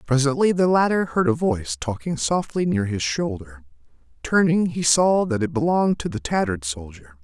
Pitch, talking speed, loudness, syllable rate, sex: 140 Hz, 175 wpm, -21 LUFS, 5.3 syllables/s, male